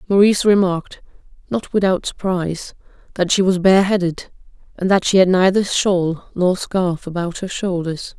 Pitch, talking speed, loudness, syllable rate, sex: 185 Hz, 155 wpm, -17 LUFS, 4.8 syllables/s, female